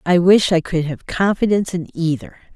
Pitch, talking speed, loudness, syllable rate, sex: 175 Hz, 190 wpm, -18 LUFS, 5.2 syllables/s, female